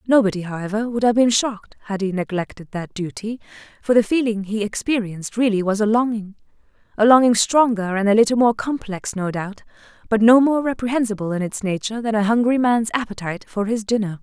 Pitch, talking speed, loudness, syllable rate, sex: 215 Hz, 185 wpm, -20 LUFS, 5.9 syllables/s, female